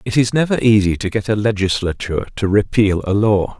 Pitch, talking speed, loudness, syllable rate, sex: 105 Hz, 200 wpm, -17 LUFS, 5.7 syllables/s, male